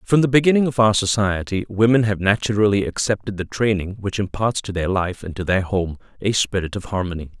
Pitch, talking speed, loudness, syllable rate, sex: 100 Hz, 205 wpm, -20 LUFS, 5.8 syllables/s, male